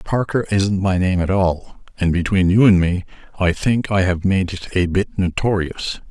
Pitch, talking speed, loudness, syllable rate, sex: 95 Hz, 195 wpm, -18 LUFS, 4.5 syllables/s, male